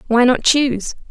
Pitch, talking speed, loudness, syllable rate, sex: 250 Hz, 165 wpm, -15 LUFS, 5.0 syllables/s, female